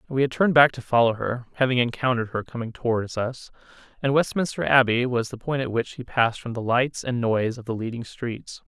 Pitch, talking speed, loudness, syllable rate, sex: 125 Hz, 220 wpm, -23 LUFS, 5.8 syllables/s, male